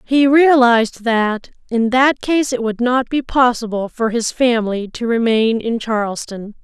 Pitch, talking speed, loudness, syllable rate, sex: 235 Hz, 165 wpm, -16 LUFS, 4.3 syllables/s, female